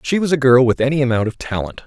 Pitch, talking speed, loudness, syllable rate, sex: 130 Hz, 290 wpm, -16 LUFS, 6.9 syllables/s, male